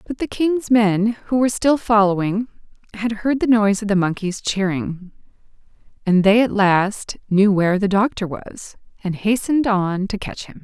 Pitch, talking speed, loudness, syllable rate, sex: 210 Hz, 175 wpm, -19 LUFS, 4.7 syllables/s, female